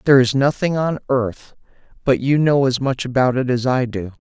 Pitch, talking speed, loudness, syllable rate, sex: 130 Hz, 200 wpm, -18 LUFS, 5.3 syllables/s, male